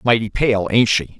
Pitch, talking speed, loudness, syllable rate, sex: 110 Hz, 200 wpm, -17 LUFS, 4.7 syllables/s, male